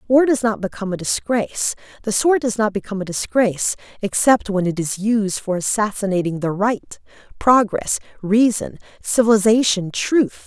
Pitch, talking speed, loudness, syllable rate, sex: 215 Hz, 150 wpm, -19 LUFS, 5.0 syllables/s, female